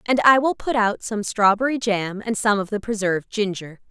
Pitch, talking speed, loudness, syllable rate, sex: 215 Hz, 215 wpm, -21 LUFS, 5.2 syllables/s, female